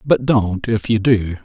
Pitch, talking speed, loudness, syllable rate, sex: 110 Hz, 210 wpm, -17 LUFS, 3.8 syllables/s, male